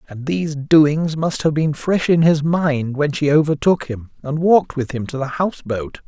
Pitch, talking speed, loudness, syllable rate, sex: 150 Hz, 215 wpm, -18 LUFS, 4.7 syllables/s, male